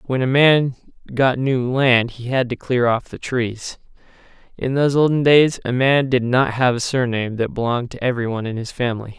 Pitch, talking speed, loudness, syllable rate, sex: 125 Hz, 200 wpm, -18 LUFS, 5.4 syllables/s, male